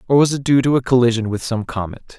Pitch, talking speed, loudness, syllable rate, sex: 125 Hz, 275 wpm, -17 LUFS, 6.5 syllables/s, male